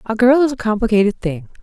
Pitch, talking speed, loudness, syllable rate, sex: 225 Hz, 220 wpm, -16 LUFS, 6.4 syllables/s, female